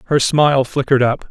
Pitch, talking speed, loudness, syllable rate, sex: 135 Hz, 185 wpm, -15 LUFS, 6.3 syllables/s, male